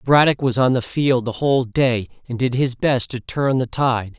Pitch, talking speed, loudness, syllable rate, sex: 125 Hz, 245 wpm, -19 LUFS, 4.6 syllables/s, male